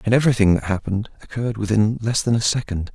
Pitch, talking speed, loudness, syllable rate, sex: 110 Hz, 205 wpm, -20 LUFS, 7.0 syllables/s, male